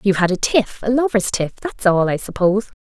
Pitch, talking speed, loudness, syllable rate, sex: 190 Hz, 190 wpm, -18 LUFS, 5.9 syllables/s, female